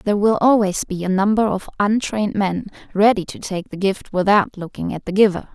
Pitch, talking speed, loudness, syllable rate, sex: 200 Hz, 205 wpm, -19 LUFS, 5.5 syllables/s, female